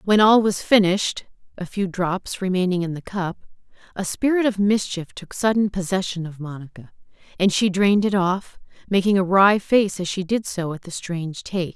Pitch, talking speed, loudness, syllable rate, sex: 190 Hz, 190 wpm, -21 LUFS, 5.2 syllables/s, female